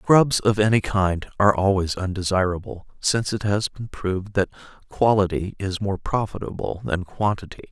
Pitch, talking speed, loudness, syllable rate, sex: 100 Hz, 150 wpm, -23 LUFS, 5.0 syllables/s, male